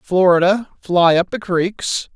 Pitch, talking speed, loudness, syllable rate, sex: 185 Hz, 140 wpm, -16 LUFS, 3.7 syllables/s, male